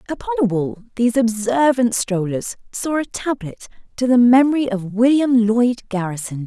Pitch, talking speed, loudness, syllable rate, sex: 235 Hz, 150 wpm, -18 LUFS, 4.8 syllables/s, female